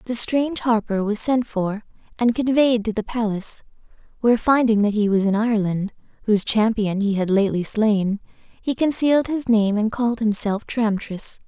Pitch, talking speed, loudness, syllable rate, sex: 220 Hz, 165 wpm, -21 LUFS, 5.1 syllables/s, female